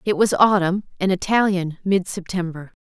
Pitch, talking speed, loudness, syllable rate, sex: 185 Hz, 150 wpm, -20 LUFS, 4.9 syllables/s, female